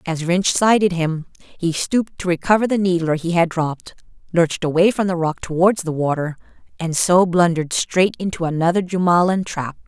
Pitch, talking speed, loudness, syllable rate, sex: 175 Hz, 175 wpm, -18 LUFS, 5.2 syllables/s, female